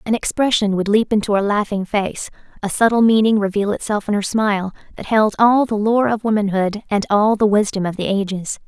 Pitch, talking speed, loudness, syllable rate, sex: 210 Hz, 210 wpm, -17 LUFS, 5.5 syllables/s, female